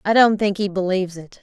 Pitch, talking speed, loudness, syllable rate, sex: 195 Hz, 255 wpm, -19 LUFS, 6.0 syllables/s, female